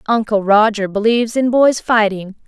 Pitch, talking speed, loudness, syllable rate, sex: 220 Hz, 145 wpm, -14 LUFS, 5.0 syllables/s, female